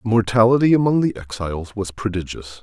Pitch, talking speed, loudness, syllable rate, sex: 110 Hz, 160 wpm, -19 LUFS, 5.9 syllables/s, male